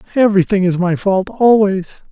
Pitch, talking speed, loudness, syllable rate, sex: 195 Hz, 140 wpm, -14 LUFS, 5.5 syllables/s, male